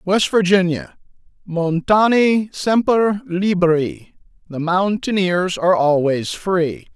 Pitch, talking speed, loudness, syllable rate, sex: 185 Hz, 80 wpm, -17 LUFS, 3.5 syllables/s, male